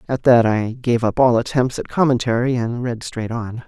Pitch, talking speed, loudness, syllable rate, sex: 120 Hz, 210 wpm, -18 LUFS, 4.9 syllables/s, male